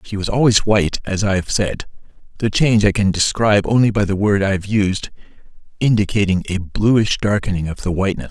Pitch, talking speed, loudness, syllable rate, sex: 100 Hz, 195 wpm, -17 LUFS, 5.8 syllables/s, male